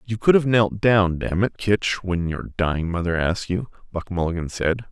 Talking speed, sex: 205 wpm, male